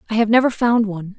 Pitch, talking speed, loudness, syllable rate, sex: 220 Hz, 250 wpm, -17 LUFS, 7.2 syllables/s, female